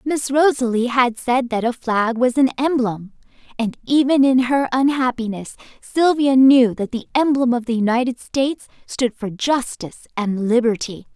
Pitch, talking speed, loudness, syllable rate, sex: 250 Hz, 155 wpm, -18 LUFS, 4.7 syllables/s, female